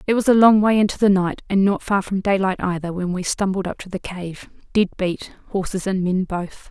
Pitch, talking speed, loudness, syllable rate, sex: 190 Hz, 235 wpm, -20 LUFS, 5.3 syllables/s, female